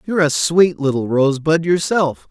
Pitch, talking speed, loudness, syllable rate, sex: 160 Hz, 155 wpm, -16 LUFS, 5.0 syllables/s, male